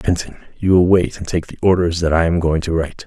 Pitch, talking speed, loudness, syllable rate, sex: 85 Hz, 295 wpm, -17 LUFS, 6.6 syllables/s, male